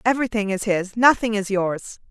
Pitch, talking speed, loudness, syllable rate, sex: 210 Hz, 170 wpm, -20 LUFS, 5.2 syllables/s, female